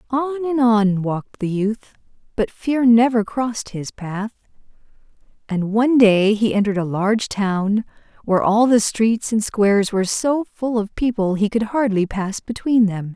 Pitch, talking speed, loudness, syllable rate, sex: 220 Hz, 170 wpm, -19 LUFS, 4.7 syllables/s, female